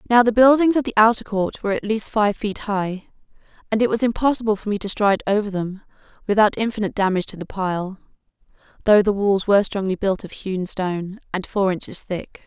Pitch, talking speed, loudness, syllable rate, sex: 205 Hz, 200 wpm, -20 LUFS, 5.9 syllables/s, female